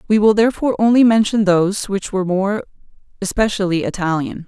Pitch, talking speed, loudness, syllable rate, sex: 200 Hz, 145 wpm, -17 LUFS, 6.3 syllables/s, female